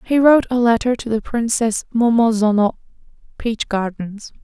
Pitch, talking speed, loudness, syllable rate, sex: 230 Hz, 150 wpm, -17 LUFS, 4.9 syllables/s, female